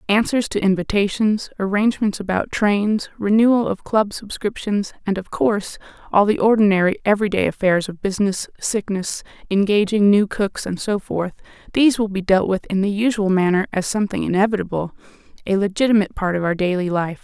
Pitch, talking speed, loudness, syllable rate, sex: 200 Hz, 160 wpm, -19 LUFS, 5.6 syllables/s, female